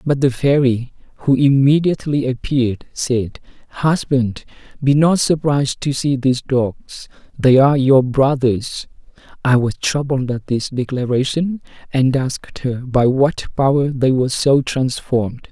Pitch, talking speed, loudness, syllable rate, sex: 130 Hz, 135 wpm, -17 LUFS, 4.4 syllables/s, male